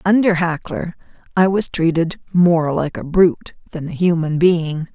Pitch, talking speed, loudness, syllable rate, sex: 170 Hz, 160 wpm, -17 LUFS, 4.3 syllables/s, female